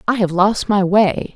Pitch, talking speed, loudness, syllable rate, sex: 200 Hz, 220 wpm, -16 LUFS, 4.1 syllables/s, female